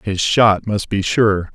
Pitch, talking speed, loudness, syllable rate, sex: 100 Hz, 195 wpm, -16 LUFS, 3.5 syllables/s, male